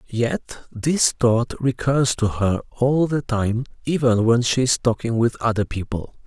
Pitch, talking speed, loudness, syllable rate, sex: 120 Hz, 165 wpm, -21 LUFS, 4.0 syllables/s, male